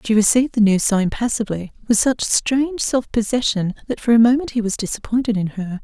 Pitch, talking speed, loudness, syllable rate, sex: 225 Hz, 205 wpm, -18 LUFS, 6.1 syllables/s, female